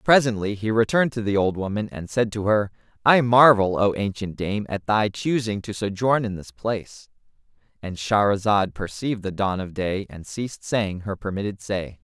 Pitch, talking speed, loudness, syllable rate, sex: 105 Hz, 180 wpm, -23 LUFS, 5.0 syllables/s, male